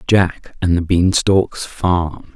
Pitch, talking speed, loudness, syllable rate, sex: 90 Hz, 155 wpm, -17 LUFS, 2.8 syllables/s, male